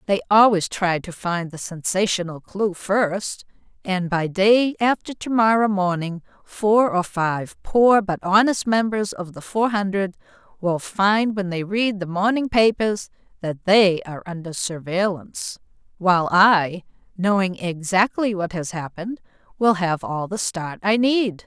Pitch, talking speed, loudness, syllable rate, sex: 195 Hz, 150 wpm, -21 LUFS, 4.1 syllables/s, female